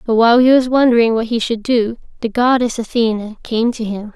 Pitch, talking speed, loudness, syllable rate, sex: 230 Hz, 215 wpm, -15 LUFS, 5.6 syllables/s, female